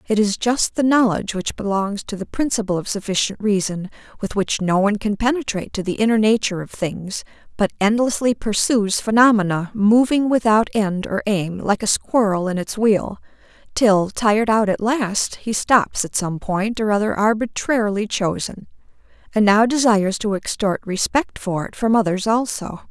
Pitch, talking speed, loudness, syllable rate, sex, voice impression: 210 Hz, 170 wpm, -19 LUFS, 4.9 syllables/s, female, feminine, slightly adult-like, bright, muffled, raspy, slightly intellectual, slightly calm, friendly, slightly elegant, slightly sharp, slightly modest